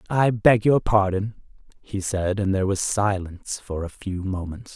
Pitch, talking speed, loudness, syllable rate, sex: 100 Hz, 175 wpm, -23 LUFS, 4.7 syllables/s, male